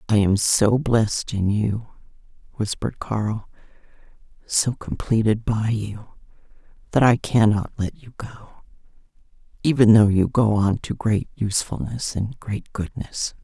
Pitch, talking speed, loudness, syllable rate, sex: 110 Hz, 130 wpm, -21 LUFS, 4.4 syllables/s, female